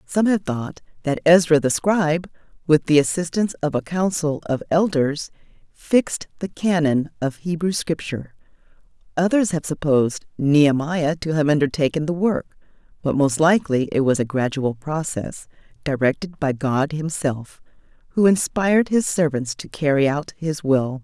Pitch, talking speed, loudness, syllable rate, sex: 155 Hz, 145 wpm, -20 LUFS, 4.8 syllables/s, female